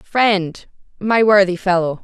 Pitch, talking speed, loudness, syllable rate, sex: 195 Hz, 120 wpm, -15 LUFS, 3.6 syllables/s, female